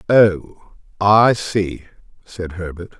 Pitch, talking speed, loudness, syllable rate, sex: 95 Hz, 100 wpm, -17 LUFS, 2.9 syllables/s, male